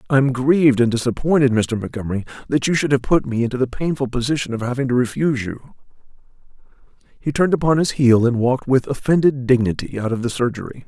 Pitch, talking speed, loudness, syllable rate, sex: 130 Hz, 200 wpm, -19 LUFS, 6.6 syllables/s, male